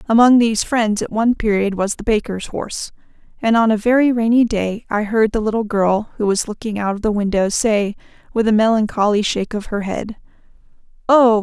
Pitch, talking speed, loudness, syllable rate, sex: 215 Hz, 195 wpm, -17 LUFS, 5.5 syllables/s, female